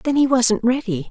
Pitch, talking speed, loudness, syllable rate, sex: 235 Hz, 215 wpm, -18 LUFS, 5.0 syllables/s, female